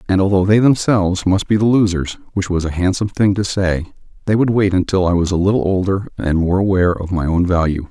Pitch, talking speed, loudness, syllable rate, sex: 95 Hz, 220 wpm, -16 LUFS, 6.0 syllables/s, male